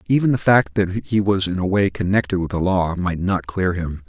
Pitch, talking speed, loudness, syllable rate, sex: 95 Hz, 250 wpm, -20 LUFS, 5.1 syllables/s, male